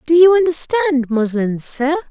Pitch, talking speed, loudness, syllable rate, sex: 295 Hz, 145 wpm, -15 LUFS, 4.3 syllables/s, female